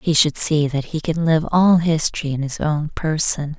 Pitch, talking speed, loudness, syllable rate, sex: 155 Hz, 215 wpm, -18 LUFS, 4.7 syllables/s, female